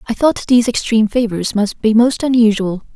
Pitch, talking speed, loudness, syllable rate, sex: 225 Hz, 185 wpm, -14 LUFS, 5.5 syllables/s, female